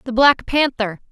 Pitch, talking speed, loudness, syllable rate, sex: 250 Hz, 160 wpm, -17 LUFS, 4.4 syllables/s, female